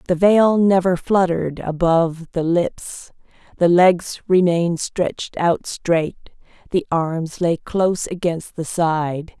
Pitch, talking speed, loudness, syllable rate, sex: 170 Hz, 130 wpm, -19 LUFS, 3.8 syllables/s, female